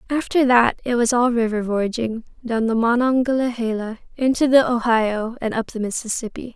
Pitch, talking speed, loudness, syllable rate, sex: 235 Hz, 155 wpm, -20 LUFS, 4.9 syllables/s, female